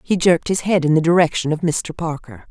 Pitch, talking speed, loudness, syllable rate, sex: 165 Hz, 240 wpm, -18 LUFS, 5.8 syllables/s, female